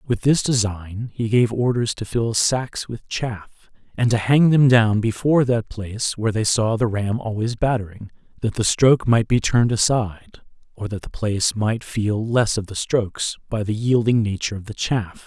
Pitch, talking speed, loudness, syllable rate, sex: 110 Hz, 195 wpm, -20 LUFS, 4.9 syllables/s, male